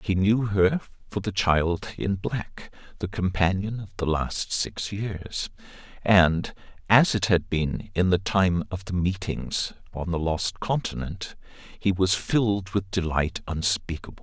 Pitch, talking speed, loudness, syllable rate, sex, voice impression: 95 Hz, 150 wpm, -25 LUFS, 3.9 syllables/s, male, very masculine, very adult-like, slightly thick, cool, sincere, calm, slightly elegant